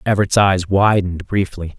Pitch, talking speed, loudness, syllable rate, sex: 95 Hz, 135 wpm, -16 LUFS, 4.8 syllables/s, male